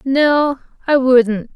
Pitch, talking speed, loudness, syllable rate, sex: 260 Hz, 115 wpm, -14 LUFS, 2.6 syllables/s, female